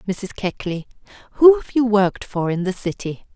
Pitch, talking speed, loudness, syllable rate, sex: 205 Hz, 180 wpm, -19 LUFS, 5.3 syllables/s, female